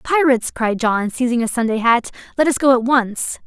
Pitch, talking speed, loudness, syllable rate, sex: 245 Hz, 210 wpm, -17 LUFS, 5.3 syllables/s, female